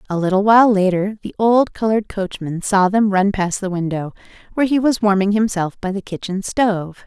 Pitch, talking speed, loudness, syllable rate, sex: 200 Hz, 195 wpm, -17 LUFS, 5.5 syllables/s, female